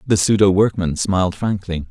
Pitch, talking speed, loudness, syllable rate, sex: 95 Hz, 160 wpm, -17 LUFS, 5.1 syllables/s, male